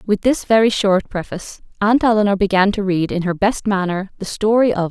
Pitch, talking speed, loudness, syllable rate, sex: 200 Hz, 210 wpm, -17 LUFS, 5.5 syllables/s, female